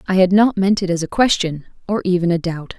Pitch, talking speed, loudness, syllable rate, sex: 185 Hz, 260 wpm, -17 LUFS, 5.8 syllables/s, female